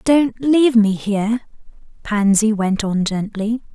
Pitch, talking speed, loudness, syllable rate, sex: 220 Hz, 130 wpm, -17 LUFS, 4.0 syllables/s, female